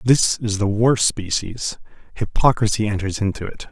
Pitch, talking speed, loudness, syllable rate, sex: 105 Hz, 145 wpm, -20 LUFS, 4.7 syllables/s, male